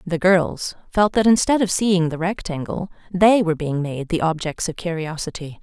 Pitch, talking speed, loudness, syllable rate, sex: 175 Hz, 180 wpm, -20 LUFS, 4.9 syllables/s, female